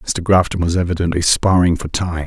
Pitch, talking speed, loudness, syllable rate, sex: 85 Hz, 185 wpm, -16 LUFS, 5.4 syllables/s, male